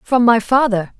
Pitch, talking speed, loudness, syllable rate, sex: 225 Hz, 180 wpm, -14 LUFS, 4.6 syllables/s, female